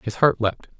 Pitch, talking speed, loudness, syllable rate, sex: 115 Hz, 225 wpm, -21 LUFS, 5.0 syllables/s, male